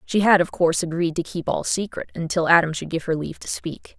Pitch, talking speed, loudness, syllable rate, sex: 170 Hz, 255 wpm, -22 LUFS, 6.0 syllables/s, female